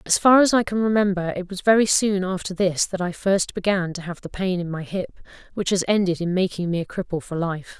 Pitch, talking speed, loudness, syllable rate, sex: 185 Hz, 255 wpm, -22 LUFS, 5.7 syllables/s, female